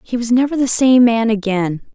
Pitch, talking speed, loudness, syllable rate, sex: 235 Hz, 215 wpm, -15 LUFS, 5.1 syllables/s, female